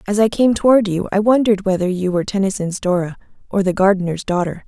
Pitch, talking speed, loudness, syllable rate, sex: 195 Hz, 205 wpm, -17 LUFS, 6.5 syllables/s, female